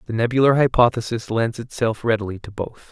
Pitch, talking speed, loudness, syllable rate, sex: 115 Hz, 165 wpm, -20 LUFS, 5.8 syllables/s, male